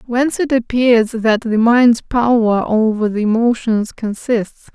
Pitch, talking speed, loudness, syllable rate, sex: 230 Hz, 140 wpm, -15 LUFS, 3.9 syllables/s, female